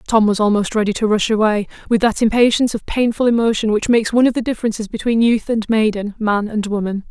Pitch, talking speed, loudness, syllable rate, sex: 220 Hz, 220 wpm, -17 LUFS, 6.4 syllables/s, female